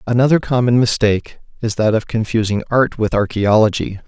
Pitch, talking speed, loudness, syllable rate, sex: 115 Hz, 145 wpm, -16 LUFS, 5.6 syllables/s, male